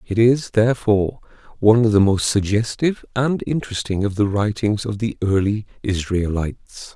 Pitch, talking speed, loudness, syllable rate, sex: 105 Hz, 145 wpm, -19 LUFS, 5.2 syllables/s, male